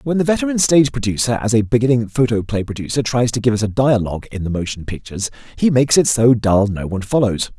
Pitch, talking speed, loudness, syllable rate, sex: 115 Hz, 220 wpm, -17 LUFS, 6.6 syllables/s, male